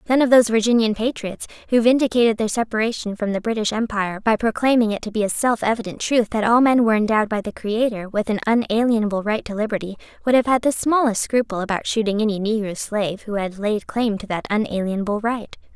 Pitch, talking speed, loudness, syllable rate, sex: 220 Hz, 205 wpm, -20 LUFS, 6.3 syllables/s, female